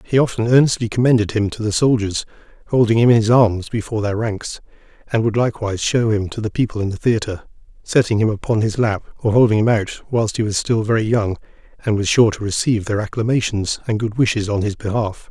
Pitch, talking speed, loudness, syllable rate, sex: 110 Hz, 215 wpm, -18 LUFS, 6.1 syllables/s, male